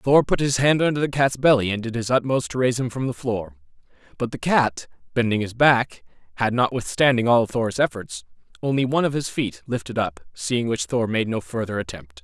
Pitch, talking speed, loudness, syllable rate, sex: 125 Hz, 210 wpm, -22 LUFS, 5.4 syllables/s, male